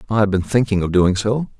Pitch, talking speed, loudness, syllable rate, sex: 105 Hz, 265 wpm, -18 LUFS, 6.0 syllables/s, male